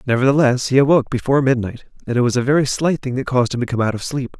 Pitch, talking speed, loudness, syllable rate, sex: 130 Hz, 275 wpm, -17 LUFS, 7.4 syllables/s, male